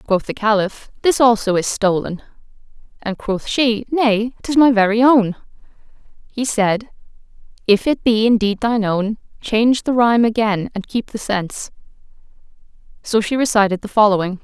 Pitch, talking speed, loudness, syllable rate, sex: 220 Hz, 150 wpm, -17 LUFS, 5.0 syllables/s, female